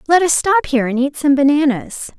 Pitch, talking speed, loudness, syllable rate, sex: 285 Hz, 220 wpm, -15 LUFS, 5.6 syllables/s, female